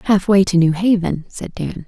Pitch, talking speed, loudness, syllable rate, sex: 185 Hz, 130 wpm, -16 LUFS, 4.9 syllables/s, female